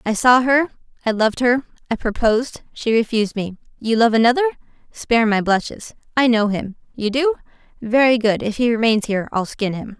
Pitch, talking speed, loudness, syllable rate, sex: 230 Hz, 155 wpm, -18 LUFS, 5.7 syllables/s, female